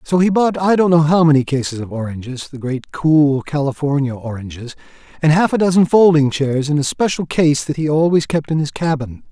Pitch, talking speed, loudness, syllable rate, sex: 150 Hz, 205 wpm, -16 LUFS, 5.4 syllables/s, male